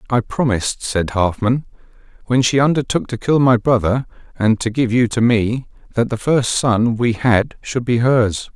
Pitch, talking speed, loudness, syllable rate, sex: 120 Hz, 180 wpm, -17 LUFS, 4.5 syllables/s, male